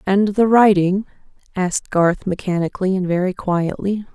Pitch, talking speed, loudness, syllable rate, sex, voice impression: 190 Hz, 130 wpm, -18 LUFS, 4.9 syllables/s, female, very feminine, adult-like, slightly middle-aged, slightly thin, slightly relaxed, slightly weak, slightly bright, soft, clear, fluent, cool, very intellectual, slightly refreshing, very sincere, very calm, friendly, very reassuring, unique, elegant, slightly sweet, very kind, slightly sharp